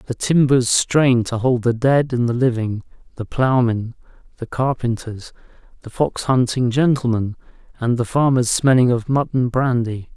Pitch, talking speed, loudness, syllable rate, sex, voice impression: 125 Hz, 155 wpm, -18 LUFS, 4.4 syllables/s, male, masculine, very adult-like, cool, intellectual, sincere, elegant